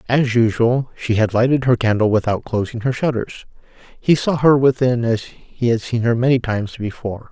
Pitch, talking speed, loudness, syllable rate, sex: 120 Hz, 190 wpm, -18 LUFS, 5.2 syllables/s, male